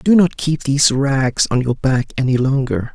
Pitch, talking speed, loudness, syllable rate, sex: 135 Hz, 205 wpm, -16 LUFS, 4.5 syllables/s, male